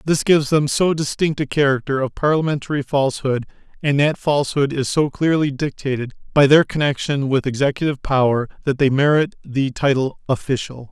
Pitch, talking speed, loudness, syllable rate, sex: 140 Hz, 160 wpm, -19 LUFS, 5.6 syllables/s, male